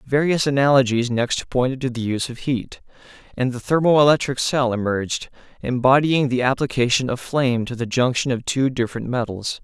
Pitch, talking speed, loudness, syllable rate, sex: 130 Hz, 160 wpm, -20 LUFS, 5.4 syllables/s, male